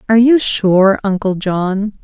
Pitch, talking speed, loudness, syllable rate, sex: 205 Hz, 145 wpm, -13 LUFS, 3.9 syllables/s, female